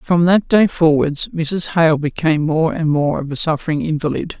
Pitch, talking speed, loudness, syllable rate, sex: 160 Hz, 190 wpm, -16 LUFS, 4.9 syllables/s, female